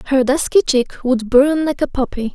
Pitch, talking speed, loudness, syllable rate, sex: 265 Hz, 205 wpm, -16 LUFS, 4.9 syllables/s, female